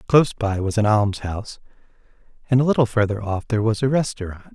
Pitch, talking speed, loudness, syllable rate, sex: 110 Hz, 185 wpm, -21 LUFS, 6.5 syllables/s, male